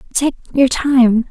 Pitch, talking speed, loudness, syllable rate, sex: 255 Hz, 140 wpm, -14 LUFS, 3.6 syllables/s, female